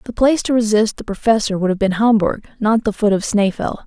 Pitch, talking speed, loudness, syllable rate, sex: 215 Hz, 235 wpm, -17 LUFS, 5.9 syllables/s, female